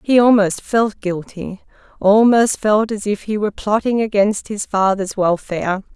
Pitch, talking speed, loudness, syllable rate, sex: 205 Hz, 150 wpm, -17 LUFS, 4.5 syllables/s, female